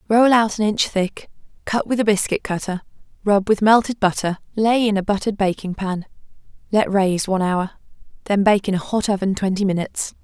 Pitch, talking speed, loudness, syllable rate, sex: 200 Hz, 190 wpm, -19 LUFS, 5.7 syllables/s, female